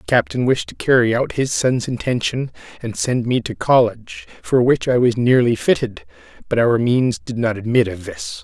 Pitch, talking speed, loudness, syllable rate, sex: 120 Hz, 200 wpm, -18 LUFS, 4.9 syllables/s, male